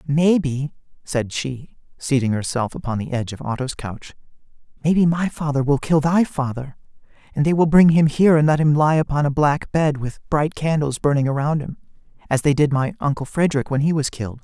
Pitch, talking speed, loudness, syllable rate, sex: 145 Hz, 200 wpm, -20 LUFS, 5.5 syllables/s, male